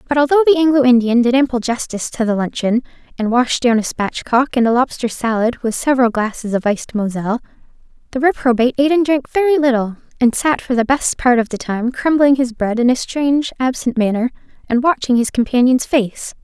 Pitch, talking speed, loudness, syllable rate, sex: 250 Hz, 200 wpm, -16 LUFS, 5.9 syllables/s, female